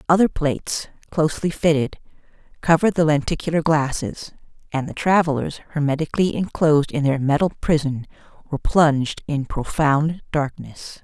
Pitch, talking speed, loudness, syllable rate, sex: 150 Hz, 120 wpm, -21 LUFS, 5.3 syllables/s, female